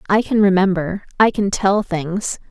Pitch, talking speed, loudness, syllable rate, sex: 195 Hz, 170 wpm, -17 LUFS, 4.3 syllables/s, female